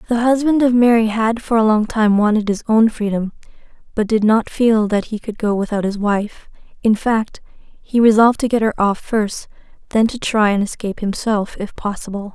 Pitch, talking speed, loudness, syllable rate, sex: 220 Hz, 200 wpm, -17 LUFS, 5.0 syllables/s, female